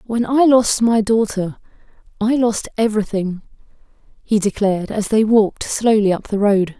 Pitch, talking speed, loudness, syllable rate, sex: 215 Hz, 150 wpm, -17 LUFS, 4.8 syllables/s, female